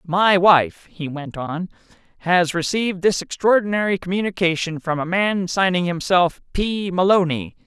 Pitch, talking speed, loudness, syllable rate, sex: 180 Hz, 135 wpm, -19 LUFS, 4.6 syllables/s, male